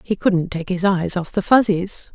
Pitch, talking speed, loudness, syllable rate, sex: 185 Hz, 225 wpm, -19 LUFS, 4.4 syllables/s, female